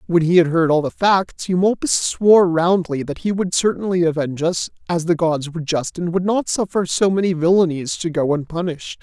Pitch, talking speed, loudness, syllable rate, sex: 175 Hz, 205 wpm, -18 LUFS, 2.0 syllables/s, male